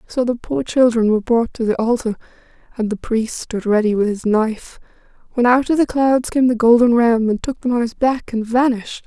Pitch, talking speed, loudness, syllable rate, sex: 235 Hz, 225 wpm, -17 LUFS, 5.4 syllables/s, female